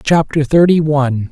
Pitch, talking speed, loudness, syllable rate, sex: 150 Hz, 135 wpm, -13 LUFS, 5.0 syllables/s, male